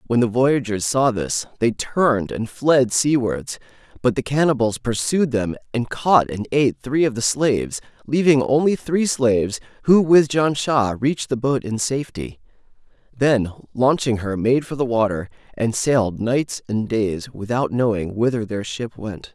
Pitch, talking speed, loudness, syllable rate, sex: 120 Hz, 165 wpm, -20 LUFS, 4.4 syllables/s, male